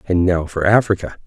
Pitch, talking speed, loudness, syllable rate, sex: 90 Hz, 190 wpm, -17 LUFS, 5.6 syllables/s, male